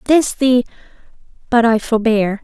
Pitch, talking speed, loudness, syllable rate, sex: 235 Hz, 100 wpm, -15 LUFS, 4.2 syllables/s, female